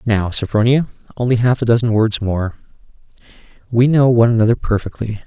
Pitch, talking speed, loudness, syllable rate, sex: 115 Hz, 150 wpm, -16 LUFS, 5.9 syllables/s, male